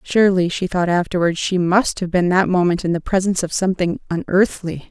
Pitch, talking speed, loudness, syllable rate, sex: 180 Hz, 195 wpm, -18 LUFS, 5.7 syllables/s, female